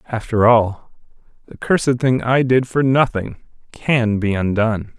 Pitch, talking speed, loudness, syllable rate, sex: 120 Hz, 145 wpm, -17 LUFS, 4.3 syllables/s, male